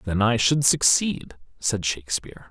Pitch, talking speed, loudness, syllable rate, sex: 115 Hz, 145 wpm, -22 LUFS, 4.7 syllables/s, male